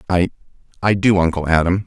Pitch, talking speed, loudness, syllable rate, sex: 90 Hz, 130 wpm, -17 LUFS, 5.9 syllables/s, male